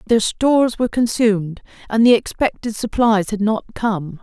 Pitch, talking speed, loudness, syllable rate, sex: 220 Hz, 155 wpm, -18 LUFS, 4.9 syllables/s, female